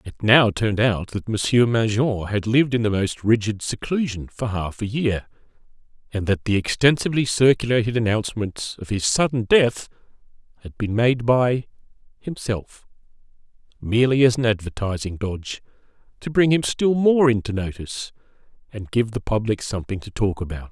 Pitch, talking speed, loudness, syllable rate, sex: 115 Hz, 155 wpm, -21 LUFS, 5.2 syllables/s, male